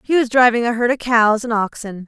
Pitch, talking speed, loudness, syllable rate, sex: 235 Hz, 260 wpm, -16 LUFS, 5.6 syllables/s, female